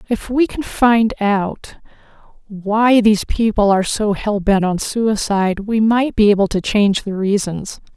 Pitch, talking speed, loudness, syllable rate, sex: 210 Hz, 165 wpm, -16 LUFS, 4.3 syllables/s, female